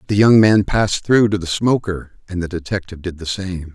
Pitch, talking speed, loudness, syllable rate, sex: 95 Hz, 225 wpm, -17 LUFS, 5.6 syllables/s, male